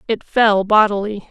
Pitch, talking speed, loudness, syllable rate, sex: 210 Hz, 140 wpm, -15 LUFS, 4.4 syllables/s, female